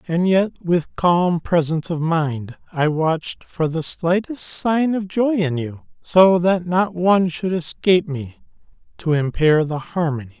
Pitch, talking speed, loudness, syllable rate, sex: 170 Hz, 160 wpm, -19 LUFS, 4.1 syllables/s, male